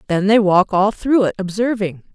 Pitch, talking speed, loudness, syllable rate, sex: 205 Hz, 195 wpm, -16 LUFS, 4.9 syllables/s, female